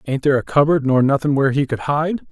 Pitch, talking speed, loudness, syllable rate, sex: 140 Hz, 260 wpm, -17 LUFS, 6.7 syllables/s, male